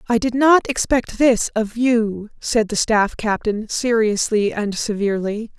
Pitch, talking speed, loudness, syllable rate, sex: 220 Hz, 150 wpm, -19 LUFS, 4.1 syllables/s, female